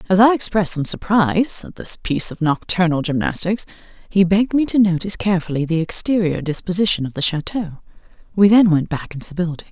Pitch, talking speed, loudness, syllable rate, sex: 185 Hz, 185 wpm, -18 LUFS, 6.2 syllables/s, female